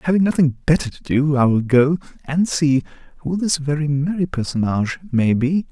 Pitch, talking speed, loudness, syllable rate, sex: 145 Hz, 180 wpm, -19 LUFS, 5.2 syllables/s, male